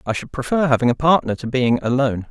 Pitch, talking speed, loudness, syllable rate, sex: 130 Hz, 235 wpm, -18 LUFS, 6.5 syllables/s, male